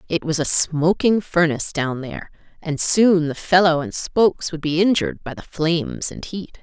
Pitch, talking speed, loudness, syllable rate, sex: 165 Hz, 190 wpm, -19 LUFS, 4.9 syllables/s, female